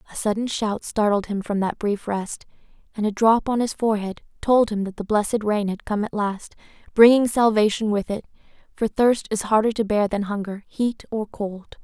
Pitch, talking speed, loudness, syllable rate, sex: 210 Hz, 205 wpm, -22 LUFS, 5.1 syllables/s, female